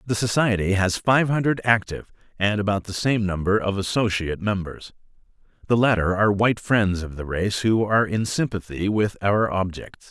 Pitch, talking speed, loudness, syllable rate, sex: 100 Hz, 170 wpm, -22 LUFS, 5.4 syllables/s, male